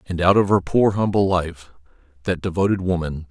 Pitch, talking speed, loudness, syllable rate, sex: 90 Hz, 180 wpm, -20 LUFS, 5.3 syllables/s, male